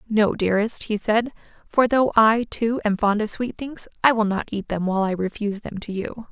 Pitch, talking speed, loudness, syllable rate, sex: 215 Hz, 230 wpm, -22 LUFS, 5.2 syllables/s, female